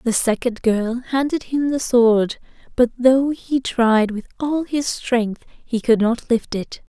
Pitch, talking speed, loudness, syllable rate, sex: 245 Hz, 175 wpm, -19 LUFS, 3.6 syllables/s, female